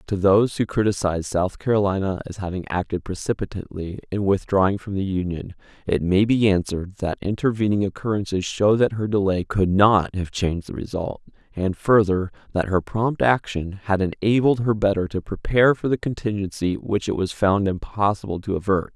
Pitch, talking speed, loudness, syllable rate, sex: 100 Hz, 170 wpm, -22 LUFS, 5.4 syllables/s, male